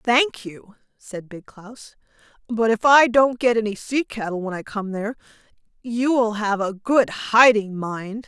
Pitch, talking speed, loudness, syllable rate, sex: 220 Hz, 175 wpm, -20 LUFS, 4.2 syllables/s, female